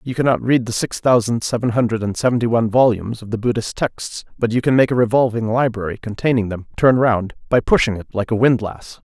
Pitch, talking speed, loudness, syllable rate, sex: 115 Hz, 215 wpm, -18 LUFS, 6.0 syllables/s, male